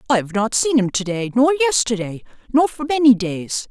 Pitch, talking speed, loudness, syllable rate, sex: 240 Hz, 210 wpm, -18 LUFS, 5.1 syllables/s, female